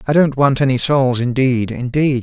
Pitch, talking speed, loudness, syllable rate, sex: 130 Hz, 190 wpm, -16 LUFS, 4.7 syllables/s, male